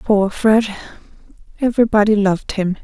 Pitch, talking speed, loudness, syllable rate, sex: 210 Hz, 105 wpm, -16 LUFS, 5.7 syllables/s, female